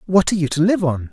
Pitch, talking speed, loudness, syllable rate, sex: 170 Hz, 320 wpm, -18 LUFS, 7.2 syllables/s, male